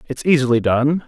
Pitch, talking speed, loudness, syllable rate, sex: 135 Hz, 165 wpm, -17 LUFS, 5.4 syllables/s, male